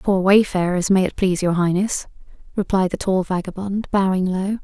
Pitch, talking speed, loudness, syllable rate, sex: 190 Hz, 170 wpm, -20 LUFS, 5.2 syllables/s, female